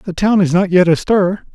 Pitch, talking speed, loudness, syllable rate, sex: 185 Hz, 230 wpm, -14 LUFS, 4.9 syllables/s, male